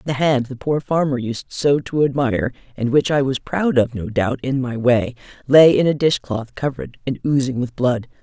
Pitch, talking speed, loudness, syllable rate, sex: 130 Hz, 210 wpm, -19 LUFS, 5.0 syllables/s, female